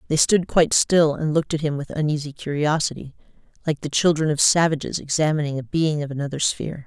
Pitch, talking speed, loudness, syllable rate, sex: 150 Hz, 190 wpm, -21 LUFS, 6.2 syllables/s, female